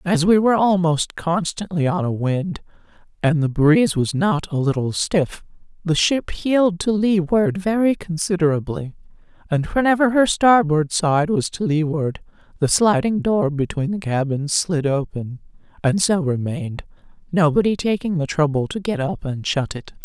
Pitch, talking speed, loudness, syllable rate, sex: 170 Hz, 155 wpm, -19 LUFS, 4.6 syllables/s, female